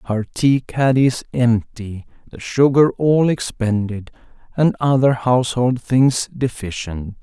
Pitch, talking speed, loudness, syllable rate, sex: 120 Hz, 115 wpm, -18 LUFS, 3.8 syllables/s, male